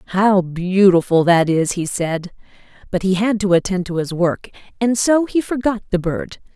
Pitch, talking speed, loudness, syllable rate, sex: 190 Hz, 185 wpm, -17 LUFS, 4.4 syllables/s, female